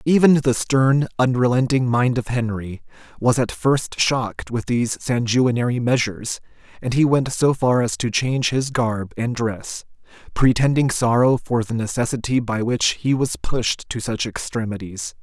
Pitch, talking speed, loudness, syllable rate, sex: 120 Hz, 160 wpm, -20 LUFS, 4.6 syllables/s, male